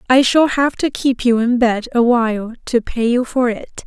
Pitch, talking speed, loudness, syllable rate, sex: 240 Hz, 215 wpm, -16 LUFS, 4.8 syllables/s, female